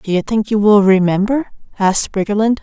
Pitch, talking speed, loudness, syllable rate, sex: 210 Hz, 185 wpm, -14 LUFS, 5.8 syllables/s, female